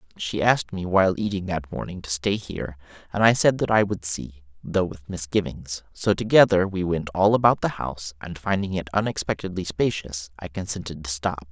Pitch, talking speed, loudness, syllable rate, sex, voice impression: 90 Hz, 195 wpm, -24 LUFS, 5.4 syllables/s, male, masculine, slightly middle-aged, slightly muffled, very calm, slightly mature, reassuring, slightly modest